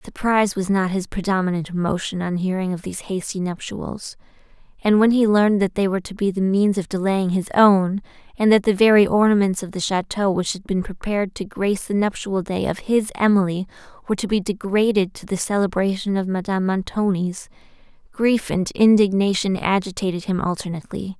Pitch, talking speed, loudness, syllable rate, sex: 195 Hz, 180 wpm, -20 LUFS, 5.6 syllables/s, female